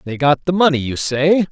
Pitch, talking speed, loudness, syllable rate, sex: 150 Hz, 235 wpm, -16 LUFS, 5.1 syllables/s, male